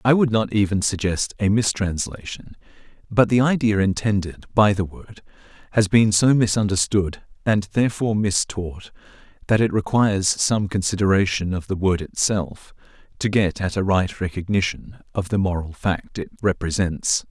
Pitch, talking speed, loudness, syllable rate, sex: 100 Hz, 145 wpm, -21 LUFS, 4.8 syllables/s, male